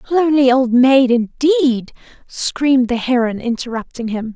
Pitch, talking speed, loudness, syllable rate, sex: 255 Hz, 125 wpm, -15 LUFS, 5.0 syllables/s, female